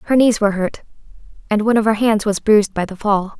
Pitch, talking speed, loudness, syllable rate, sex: 210 Hz, 245 wpm, -17 LUFS, 6.4 syllables/s, female